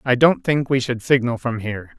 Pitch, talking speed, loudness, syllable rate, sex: 125 Hz, 240 wpm, -19 LUFS, 5.4 syllables/s, male